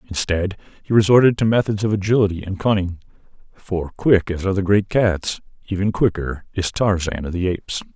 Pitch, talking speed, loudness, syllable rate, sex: 95 Hz, 175 wpm, -19 LUFS, 5.4 syllables/s, male